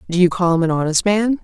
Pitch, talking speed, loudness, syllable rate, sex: 185 Hz, 295 wpm, -17 LUFS, 6.5 syllables/s, female